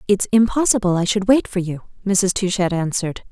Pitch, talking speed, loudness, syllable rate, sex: 195 Hz, 180 wpm, -18 LUFS, 5.6 syllables/s, female